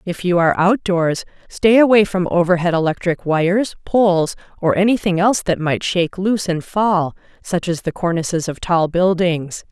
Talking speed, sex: 165 wpm, female